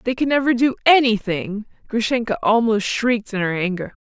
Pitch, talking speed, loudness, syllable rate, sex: 225 Hz, 165 wpm, -19 LUFS, 5.5 syllables/s, female